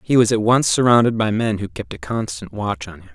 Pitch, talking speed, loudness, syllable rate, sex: 105 Hz, 265 wpm, -18 LUFS, 5.6 syllables/s, male